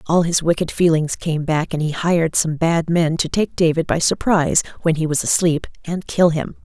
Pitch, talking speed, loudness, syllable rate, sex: 165 Hz, 215 wpm, -18 LUFS, 5.1 syllables/s, female